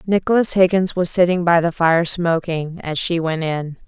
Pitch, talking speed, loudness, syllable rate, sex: 170 Hz, 185 wpm, -18 LUFS, 4.6 syllables/s, female